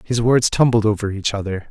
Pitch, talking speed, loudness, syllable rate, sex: 110 Hz, 210 wpm, -18 LUFS, 5.6 syllables/s, male